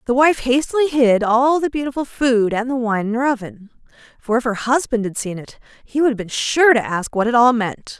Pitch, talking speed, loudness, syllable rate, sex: 245 Hz, 240 wpm, -18 LUFS, 5.3 syllables/s, female